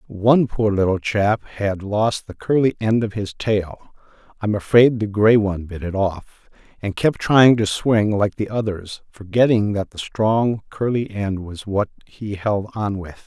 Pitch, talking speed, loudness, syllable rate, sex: 105 Hz, 170 wpm, -20 LUFS, 4.2 syllables/s, male